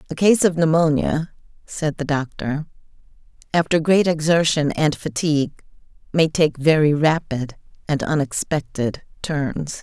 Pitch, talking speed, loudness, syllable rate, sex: 155 Hz, 115 wpm, -20 LUFS, 4.3 syllables/s, female